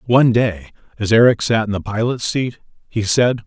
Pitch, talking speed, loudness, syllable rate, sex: 110 Hz, 190 wpm, -17 LUFS, 5.2 syllables/s, male